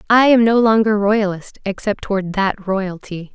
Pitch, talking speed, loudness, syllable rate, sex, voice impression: 205 Hz, 160 wpm, -17 LUFS, 4.5 syllables/s, female, very feminine, very adult-like, slightly thin, slightly relaxed, slightly weak, bright, very soft, very clear, fluent, slightly raspy, very cute, very intellectual, very refreshing, sincere, very calm, very friendly, very reassuring, very unique, very elegant, slightly wild, very sweet, lively, very kind, slightly sharp, modest, light